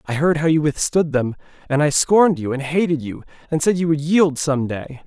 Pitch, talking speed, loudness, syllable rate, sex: 150 Hz, 235 wpm, -19 LUFS, 5.3 syllables/s, male